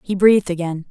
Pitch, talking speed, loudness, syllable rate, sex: 185 Hz, 200 wpm, -17 LUFS, 6.5 syllables/s, female